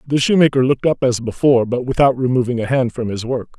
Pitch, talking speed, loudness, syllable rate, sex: 125 Hz, 235 wpm, -17 LUFS, 6.4 syllables/s, male